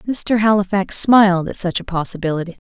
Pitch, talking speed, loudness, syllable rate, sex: 190 Hz, 155 wpm, -16 LUFS, 5.5 syllables/s, female